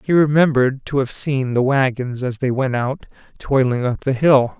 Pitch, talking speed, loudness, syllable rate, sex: 130 Hz, 195 wpm, -18 LUFS, 4.8 syllables/s, male